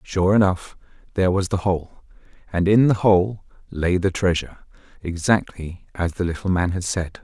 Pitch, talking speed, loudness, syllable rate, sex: 90 Hz, 165 wpm, -21 LUFS, 4.9 syllables/s, male